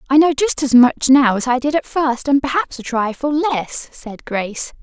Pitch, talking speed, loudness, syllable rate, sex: 265 Hz, 225 wpm, -16 LUFS, 4.7 syllables/s, female